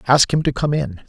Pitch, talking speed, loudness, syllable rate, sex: 130 Hz, 280 wpm, -18 LUFS, 5.5 syllables/s, male